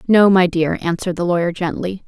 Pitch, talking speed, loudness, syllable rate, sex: 180 Hz, 200 wpm, -17 LUFS, 5.8 syllables/s, female